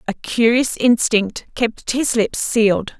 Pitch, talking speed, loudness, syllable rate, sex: 230 Hz, 140 wpm, -17 LUFS, 3.6 syllables/s, female